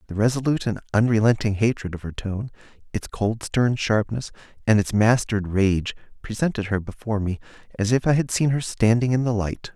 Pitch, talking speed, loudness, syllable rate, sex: 110 Hz, 185 wpm, -23 LUFS, 5.6 syllables/s, male